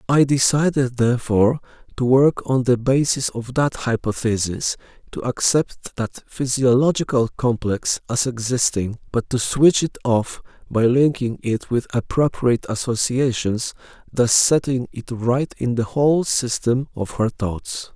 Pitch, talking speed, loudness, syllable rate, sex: 125 Hz, 135 wpm, -20 LUFS, 4.2 syllables/s, male